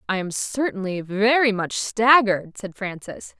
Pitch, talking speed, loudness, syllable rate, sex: 210 Hz, 140 wpm, -21 LUFS, 4.4 syllables/s, female